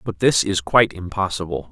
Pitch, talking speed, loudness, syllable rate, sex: 95 Hz, 175 wpm, -19 LUFS, 5.6 syllables/s, male